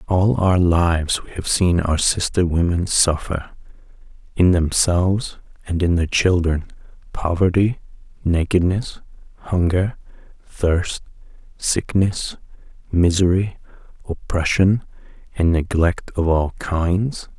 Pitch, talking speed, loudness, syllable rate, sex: 90 Hz, 95 wpm, -19 LUFS, 3.8 syllables/s, male